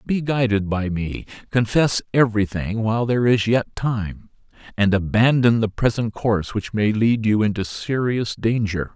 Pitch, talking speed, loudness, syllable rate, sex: 110 Hz, 155 wpm, -20 LUFS, 4.6 syllables/s, male